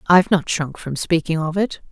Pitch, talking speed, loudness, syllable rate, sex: 170 Hz, 220 wpm, -20 LUFS, 5.3 syllables/s, female